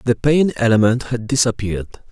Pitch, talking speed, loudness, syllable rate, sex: 120 Hz, 140 wpm, -17 LUFS, 5.3 syllables/s, male